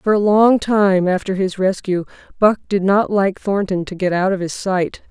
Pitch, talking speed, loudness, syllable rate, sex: 190 Hz, 210 wpm, -17 LUFS, 4.6 syllables/s, female